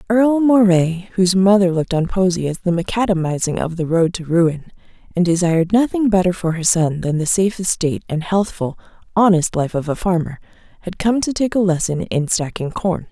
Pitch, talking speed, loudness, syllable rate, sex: 180 Hz, 190 wpm, -17 LUFS, 5.6 syllables/s, female